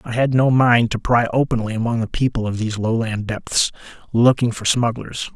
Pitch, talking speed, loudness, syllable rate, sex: 115 Hz, 190 wpm, -19 LUFS, 5.3 syllables/s, male